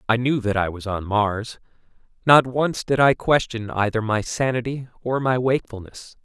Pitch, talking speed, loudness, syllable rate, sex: 120 Hz, 175 wpm, -21 LUFS, 4.8 syllables/s, male